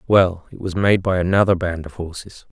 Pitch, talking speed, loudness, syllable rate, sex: 90 Hz, 210 wpm, -19 LUFS, 5.2 syllables/s, male